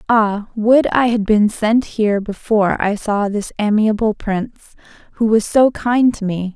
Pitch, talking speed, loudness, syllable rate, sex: 215 Hz, 175 wpm, -16 LUFS, 4.3 syllables/s, female